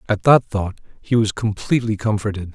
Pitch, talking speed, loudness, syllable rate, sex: 105 Hz, 165 wpm, -19 LUFS, 5.5 syllables/s, male